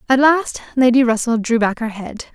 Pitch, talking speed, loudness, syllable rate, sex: 240 Hz, 205 wpm, -16 LUFS, 5.0 syllables/s, female